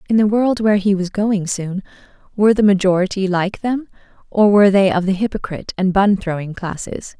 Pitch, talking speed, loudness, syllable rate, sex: 195 Hz, 190 wpm, -17 LUFS, 5.7 syllables/s, female